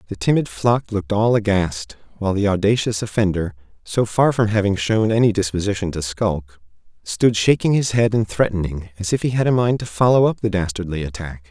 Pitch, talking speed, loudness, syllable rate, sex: 105 Hz, 195 wpm, -19 LUFS, 5.5 syllables/s, male